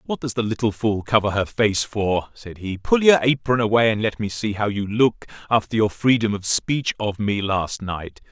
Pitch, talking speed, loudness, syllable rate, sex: 110 Hz, 225 wpm, -21 LUFS, 4.8 syllables/s, male